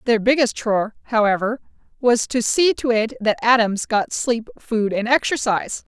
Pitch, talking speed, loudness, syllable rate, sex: 235 Hz, 160 wpm, -19 LUFS, 4.8 syllables/s, female